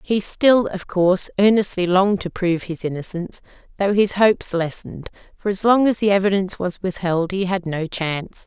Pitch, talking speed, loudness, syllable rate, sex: 190 Hz, 185 wpm, -20 LUFS, 5.5 syllables/s, female